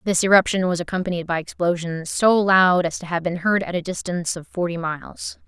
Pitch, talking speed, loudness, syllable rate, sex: 175 Hz, 210 wpm, -21 LUFS, 5.7 syllables/s, female